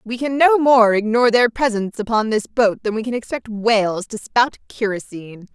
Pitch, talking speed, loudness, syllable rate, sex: 225 Hz, 195 wpm, -18 LUFS, 5.4 syllables/s, female